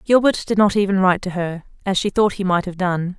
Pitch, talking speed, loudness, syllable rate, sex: 190 Hz, 265 wpm, -19 LUFS, 6.0 syllables/s, female